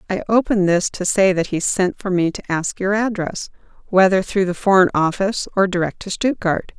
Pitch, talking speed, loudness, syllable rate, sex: 190 Hz, 195 wpm, -18 LUFS, 5.2 syllables/s, female